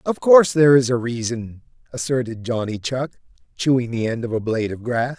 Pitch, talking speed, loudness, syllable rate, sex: 120 Hz, 195 wpm, -19 LUFS, 5.7 syllables/s, male